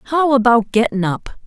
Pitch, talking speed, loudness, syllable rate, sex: 240 Hz, 165 wpm, -15 LUFS, 4.5 syllables/s, female